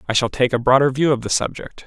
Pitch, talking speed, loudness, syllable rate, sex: 130 Hz, 290 wpm, -18 LUFS, 6.5 syllables/s, male